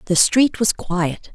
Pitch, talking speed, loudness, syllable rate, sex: 200 Hz, 180 wpm, -18 LUFS, 3.4 syllables/s, female